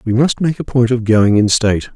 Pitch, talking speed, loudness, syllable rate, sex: 120 Hz, 275 wpm, -14 LUFS, 5.6 syllables/s, male